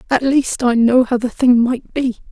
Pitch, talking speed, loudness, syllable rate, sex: 250 Hz, 235 wpm, -15 LUFS, 4.5 syllables/s, female